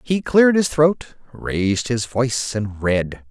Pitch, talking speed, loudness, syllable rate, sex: 125 Hz, 165 wpm, -19 LUFS, 4.0 syllables/s, male